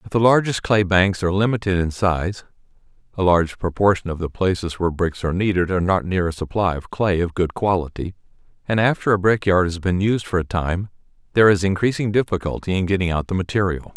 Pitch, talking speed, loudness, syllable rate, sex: 95 Hz, 210 wpm, -20 LUFS, 6.1 syllables/s, male